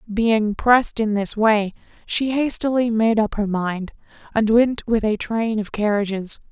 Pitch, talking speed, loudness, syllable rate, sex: 220 Hz, 165 wpm, -20 LUFS, 4.1 syllables/s, female